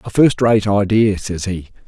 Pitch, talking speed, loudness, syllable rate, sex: 100 Hz, 190 wpm, -16 LUFS, 4.3 syllables/s, male